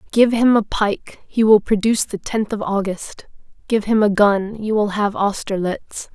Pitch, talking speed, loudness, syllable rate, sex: 210 Hz, 185 wpm, -18 LUFS, 4.4 syllables/s, female